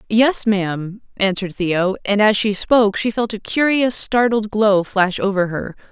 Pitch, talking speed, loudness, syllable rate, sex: 205 Hz, 170 wpm, -17 LUFS, 4.5 syllables/s, female